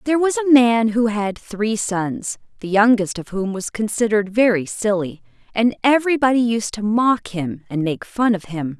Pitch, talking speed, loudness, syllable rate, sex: 220 Hz, 185 wpm, -19 LUFS, 4.8 syllables/s, female